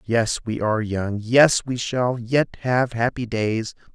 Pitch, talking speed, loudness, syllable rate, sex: 115 Hz, 165 wpm, -21 LUFS, 3.7 syllables/s, male